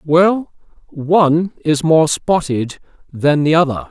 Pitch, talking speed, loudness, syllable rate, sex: 155 Hz, 125 wpm, -15 LUFS, 3.6 syllables/s, male